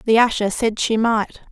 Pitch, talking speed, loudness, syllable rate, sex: 225 Hz, 195 wpm, -19 LUFS, 4.6 syllables/s, female